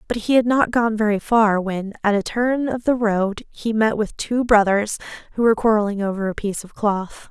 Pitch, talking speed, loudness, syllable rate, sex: 215 Hz, 220 wpm, -20 LUFS, 5.1 syllables/s, female